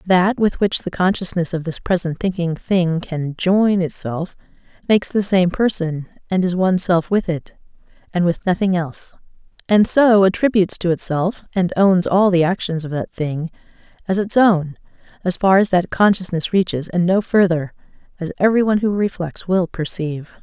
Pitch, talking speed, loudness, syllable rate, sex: 180 Hz, 175 wpm, -18 LUFS, 5.0 syllables/s, female